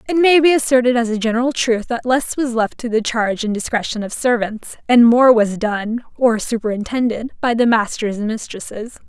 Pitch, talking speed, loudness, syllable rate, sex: 235 Hz, 200 wpm, -17 LUFS, 5.3 syllables/s, female